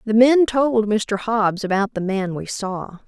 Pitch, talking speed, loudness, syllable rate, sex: 215 Hz, 195 wpm, -19 LUFS, 3.8 syllables/s, female